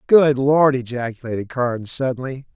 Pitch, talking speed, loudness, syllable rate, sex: 130 Hz, 120 wpm, -19 LUFS, 5.1 syllables/s, male